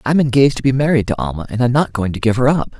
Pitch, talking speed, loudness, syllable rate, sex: 125 Hz, 320 wpm, -16 LUFS, 7.3 syllables/s, male